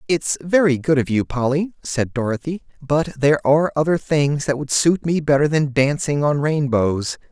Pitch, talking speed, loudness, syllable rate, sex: 145 Hz, 180 wpm, -19 LUFS, 4.8 syllables/s, male